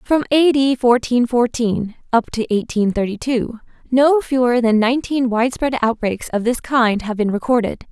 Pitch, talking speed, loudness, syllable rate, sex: 240 Hz, 165 wpm, -17 LUFS, 4.7 syllables/s, female